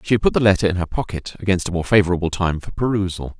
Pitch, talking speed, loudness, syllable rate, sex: 90 Hz, 265 wpm, -20 LUFS, 7.1 syllables/s, male